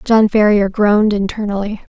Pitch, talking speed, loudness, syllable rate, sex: 205 Hz, 125 wpm, -14 LUFS, 5.1 syllables/s, female